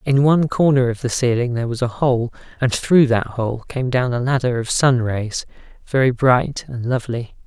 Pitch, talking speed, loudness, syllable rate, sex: 125 Hz, 195 wpm, -19 LUFS, 5.1 syllables/s, male